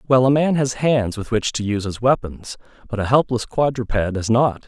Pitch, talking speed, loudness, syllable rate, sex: 120 Hz, 205 wpm, -19 LUFS, 5.0 syllables/s, male